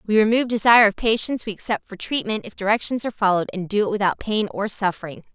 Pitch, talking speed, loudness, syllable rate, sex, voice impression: 210 Hz, 225 wpm, -21 LUFS, 6.9 syllables/s, female, feminine, middle-aged, clear, slightly fluent, intellectual, elegant, slightly strict